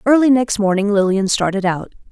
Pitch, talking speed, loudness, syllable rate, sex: 210 Hz, 170 wpm, -16 LUFS, 5.5 syllables/s, female